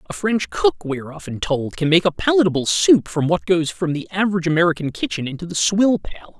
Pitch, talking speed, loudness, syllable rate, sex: 170 Hz, 225 wpm, -19 LUFS, 6.0 syllables/s, male